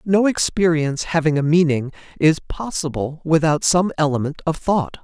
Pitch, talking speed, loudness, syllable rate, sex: 160 Hz, 145 wpm, -19 LUFS, 5.0 syllables/s, male